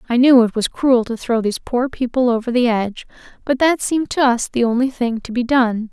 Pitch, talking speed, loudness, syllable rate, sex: 245 Hz, 245 wpm, -17 LUFS, 5.6 syllables/s, female